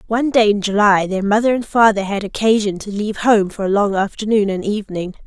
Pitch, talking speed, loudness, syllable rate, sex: 205 Hz, 215 wpm, -17 LUFS, 6.0 syllables/s, female